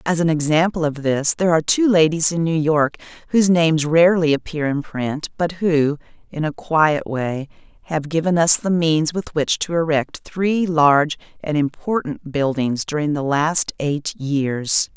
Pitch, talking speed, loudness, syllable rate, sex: 155 Hz, 170 wpm, -19 LUFS, 4.5 syllables/s, female